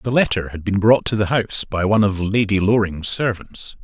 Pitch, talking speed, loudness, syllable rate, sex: 105 Hz, 220 wpm, -19 LUFS, 5.4 syllables/s, male